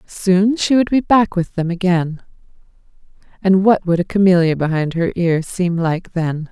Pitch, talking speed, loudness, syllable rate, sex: 180 Hz, 175 wpm, -16 LUFS, 4.4 syllables/s, female